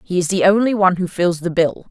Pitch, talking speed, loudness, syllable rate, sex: 185 Hz, 285 wpm, -17 LUFS, 6.2 syllables/s, female